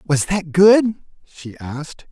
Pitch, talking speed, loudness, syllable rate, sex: 170 Hz, 140 wpm, -15 LUFS, 3.7 syllables/s, male